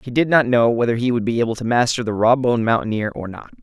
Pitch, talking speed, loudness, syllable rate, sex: 120 Hz, 280 wpm, -18 LUFS, 6.7 syllables/s, male